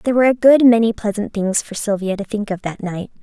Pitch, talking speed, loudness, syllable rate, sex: 215 Hz, 260 wpm, -17 LUFS, 6.1 syllables/s, female